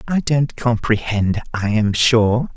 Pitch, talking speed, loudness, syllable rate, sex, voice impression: 115 Hz, 140 wpm, -18 LUFS, 3.5 syllables/s, male, masculine, adult-like, slightly relaxed, slightly hard, muffled, raspy, cool, sincere, calm, friendly, wild, lively, kind